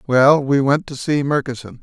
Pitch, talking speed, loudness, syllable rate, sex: 135 Hz, 195 wpm, -17 LUFS, 4.7 syllables/s, male